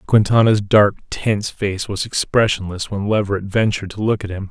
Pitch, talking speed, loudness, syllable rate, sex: 100 Hz, 175 wpm, -18 LUFS, 5.3 syllables/s, male